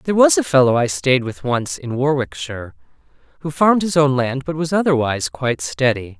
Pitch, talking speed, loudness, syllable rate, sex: 135 Hz, 195 wpm, -18 LUFS, 5.8 syllables/s, male